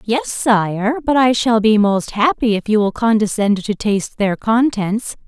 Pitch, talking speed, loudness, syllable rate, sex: 220 Hz, 180 wpm, -16 LUFS, 4.2 syllables/s, female